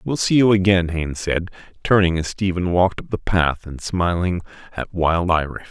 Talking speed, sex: 190 wpm, male